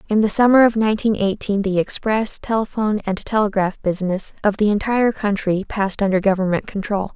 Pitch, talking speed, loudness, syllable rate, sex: 205 Hz, 170 wpm, -19 LUFS, 5.9 syllables/s, female